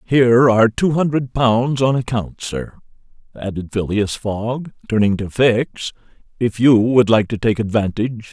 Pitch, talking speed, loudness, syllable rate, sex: 115 Hz, 150 wpm, -17 LUFS, 4.4 syllables/s, male